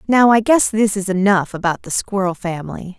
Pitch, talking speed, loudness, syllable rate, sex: 200 Hz, 200 wpm, -17 LUFS, 5.3 syllables/s, female